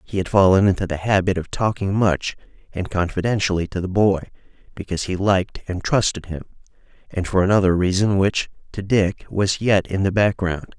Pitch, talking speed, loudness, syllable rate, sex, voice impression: 95 Hz, 180 wpm, -20 LUFS, 5.5 syllables/s, male, masculine, adult-like, slightly dark, slightly sincere, calm, slightly kind